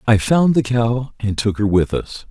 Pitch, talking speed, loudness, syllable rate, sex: 115 Hz, 235 wpm, -18 LUFS, 4.3 syllables/s, male